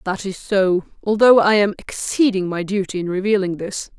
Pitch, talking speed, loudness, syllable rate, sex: 195 Hz, 180 wpm, -18 LUFS, 5.0 syllables/s, female